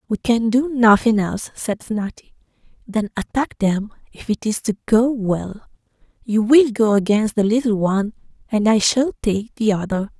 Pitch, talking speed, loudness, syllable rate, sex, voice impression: 220 Hz, 170 wpm, -19 LUFS, 4.6 syllables/s, female, very masculine, slightly young, very thin, slightly relaxed, slightly weak, slightly dark, soft, muffled, slightly fluent, slightly raspy, very cute, very intellectual, refreshing, sincere, very calm, very friendly, very reassuring, very unique, very elegant, slightly wild, very sweet, slightly lively, slightly strict, slightly sharp, modest